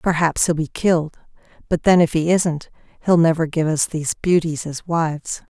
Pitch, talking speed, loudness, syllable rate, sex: 160 Hz, 185 wpm, -19 LUFS, 5.0 syllables/s, female